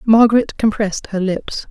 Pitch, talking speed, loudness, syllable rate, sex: 210 Hz, 140 wpm, -16 LUFS, 5.1 syllables/s, female